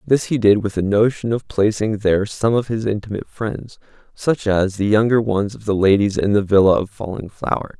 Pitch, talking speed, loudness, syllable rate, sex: 105 Hz, 215 wpm, -18 LUFS, 5.5 syllables/s, male